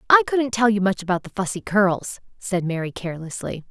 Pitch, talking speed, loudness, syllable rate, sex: 200 Hz, 195 wpm, -22 LUFS, 5.5 syllables/s, female